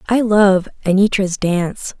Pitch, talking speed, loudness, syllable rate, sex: 195 Hz, 120 wpm, -16 LUFS, 4.2 syllables/s, female